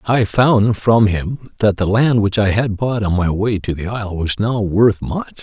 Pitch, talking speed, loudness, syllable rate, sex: 105 Hz, 230 wpm, -16 LUFS, 4.2 syllables/s, male